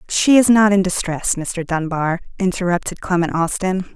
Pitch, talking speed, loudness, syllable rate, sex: 185 Hz, 150 wpm, -18 LUFS, 4.9 syllables/s, female